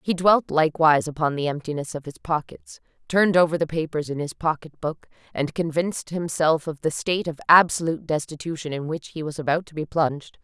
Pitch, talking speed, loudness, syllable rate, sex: 160 Hz, 195 wpm, -23 LUFS, 5.9 syllables/s, female